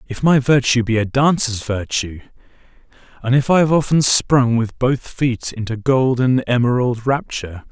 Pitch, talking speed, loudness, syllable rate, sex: 125 Hz, 155 wpm, -17 LUFS, 4.6 syllables/s, male